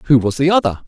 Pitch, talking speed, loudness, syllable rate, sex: 140 Hz, 275 wpm, -15 LUFS, 6.0 syllables/s, male